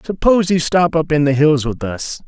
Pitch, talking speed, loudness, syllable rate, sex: 155 Hz, 240 wpm, -15 LUFS, 4.7 syllables/s, male